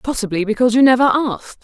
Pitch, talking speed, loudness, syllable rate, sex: 240 Hz, 185 wpm, -15 LUFS, 7.1 syllables/s, female